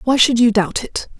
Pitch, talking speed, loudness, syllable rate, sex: 235 Hz, 250 wpm, -15 LUFS, 4.9 syllables/s, female